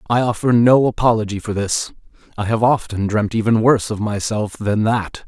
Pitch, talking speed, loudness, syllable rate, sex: 110 Hz, 180 wpm, -18 LUFS, 5.1 syllables/s, male